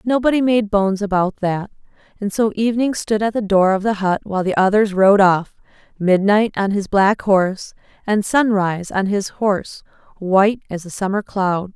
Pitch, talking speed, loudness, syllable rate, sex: 200 Hz, 175 wpm, -17 LUFS, 5.0 syllables/s, female